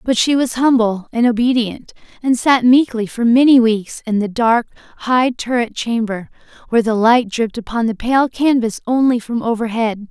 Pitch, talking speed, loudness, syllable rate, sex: 235 Hz, 170 wpm, -16 LUFS, 4.9 syllables/s, female